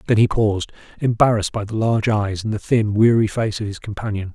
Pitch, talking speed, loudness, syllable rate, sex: 105 Hz, 220 wpm, -19 LUFS, 6.2 syllables/s, male